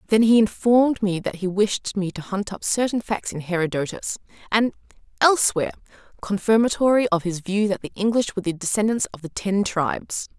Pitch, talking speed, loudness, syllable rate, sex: 205 Hz, 180 wpm, -22 LUFS, 5.6 syllables/s, female